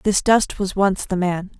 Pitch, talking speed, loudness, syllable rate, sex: 190 Hz, 225 wpm, -19 LUFS, 4.2 syllables/s, female